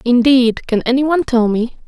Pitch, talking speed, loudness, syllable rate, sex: 250 Hz, 160 wpm, -14 LUFS, 4.7 syllables/s, female